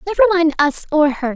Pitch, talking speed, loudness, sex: 320 Hz, 220 wpm, -16 LUFS, female